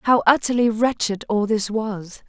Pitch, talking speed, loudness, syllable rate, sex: 220 Hz, 160 wpm, -20 LUFS, 4.4 syllables/s, female